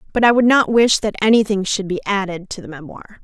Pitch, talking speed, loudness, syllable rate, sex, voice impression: 205 Hz, 240 wpm, -16 LUFS, 6.3 syllables/s, female, very feminine, slightly adult-like, very thin, very tensed, powerful, very bright, slightly hard, very clear, fluent, cute, intellectual, very refreshing, sincere, calm, very friendly, reassuring, very unique, elegant, slightly wild, very sweet, very lively, kind, intense, slightly sharp, light